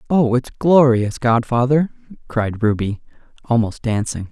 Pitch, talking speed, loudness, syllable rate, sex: 120 Hz, 110 wpm, -18 LUFS, 4.2 syllables/s, male